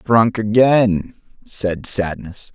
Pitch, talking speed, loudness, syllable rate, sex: 105 Hz, 95 wpm, -17 LUFS, 2.8 syllables/s, male